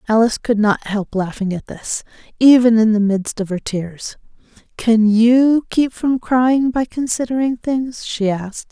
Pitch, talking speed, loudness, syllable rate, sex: 230 Hz, 165 wpm, -17 LUFS, 4.2 syllables/s, female